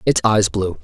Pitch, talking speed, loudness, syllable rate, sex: 100 Hz, 215 wpm, -17 LUFS, 4.5 syllables/s, male